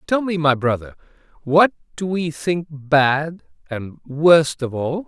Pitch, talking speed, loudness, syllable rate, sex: 155 Hz, 155 wpm, -19 LUFS, 3.6 syllables/s, male